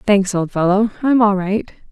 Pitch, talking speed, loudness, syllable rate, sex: 205 Hz, 190 wpm, -16 LUFS, 4.6 syllables/s, female